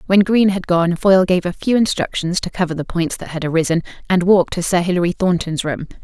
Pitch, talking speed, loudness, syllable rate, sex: 180 Hz, 230 wpm, -17 LUFS, 6.0 syllables/s, female